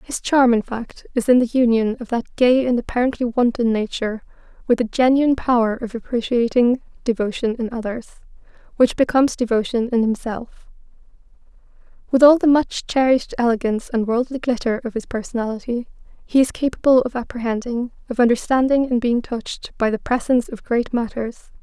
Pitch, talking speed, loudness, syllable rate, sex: 240 Hz, 160 wpm, -19 LUFS, 5.7 syllables/s, female